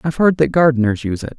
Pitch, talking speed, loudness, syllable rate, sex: 130 Hz, 260 wpm, -16 LUFS, 7.8 syllables/s, male